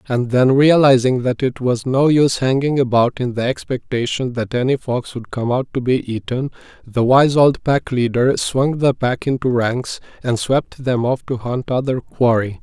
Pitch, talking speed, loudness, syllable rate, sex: 125 Hz, 190 wpm, -17 LUFS, 4.6 syllables/s, male